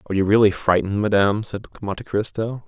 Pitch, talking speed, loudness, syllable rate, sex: 105 Hz, 180 wpm, -20 LUFS, 6.7 syllables/s, male